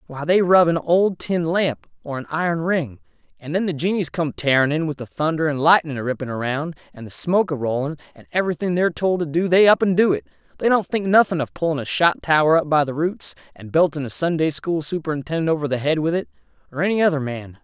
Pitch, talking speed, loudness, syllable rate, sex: 155 Hz, 240 wpm, -20 LUFS, 6.1 syllables/s, male